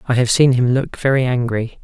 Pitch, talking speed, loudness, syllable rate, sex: 125 Hz, 230 wpm, -16 LUFS, 5.4 syllables/s, male